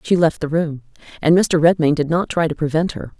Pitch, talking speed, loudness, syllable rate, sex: 160 Hz, 245 wpm, -18 LUFS, 5.6 syllables/s, female